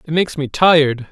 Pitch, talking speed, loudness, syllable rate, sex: 150 Hz, 215 wpm, -15 LUFS, 5.9 syllables/s, male